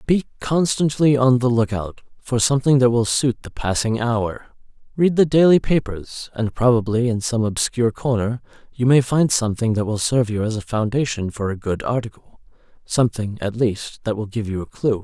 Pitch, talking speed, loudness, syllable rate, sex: 120 Hz, 190 wpm, -20 LUFS, 5.3 syllables/s, male